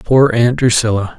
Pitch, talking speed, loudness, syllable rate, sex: 120 Hz, 150 wpm, -13 LUFS, 4.6 syllables/s, male